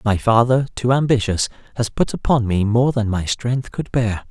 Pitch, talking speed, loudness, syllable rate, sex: 115 Hz, 195 wpm, -19 LUFS, 4.7 syllables/s, male